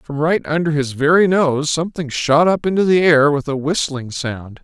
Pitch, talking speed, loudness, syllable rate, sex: 150 Hz, 205 wpm, -16 LUFS, 4.8 syllables/s, male